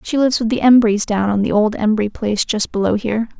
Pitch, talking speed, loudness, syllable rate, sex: 220 Hz, 245 wpm, -16 LUFS, 6.2 syllables/s, female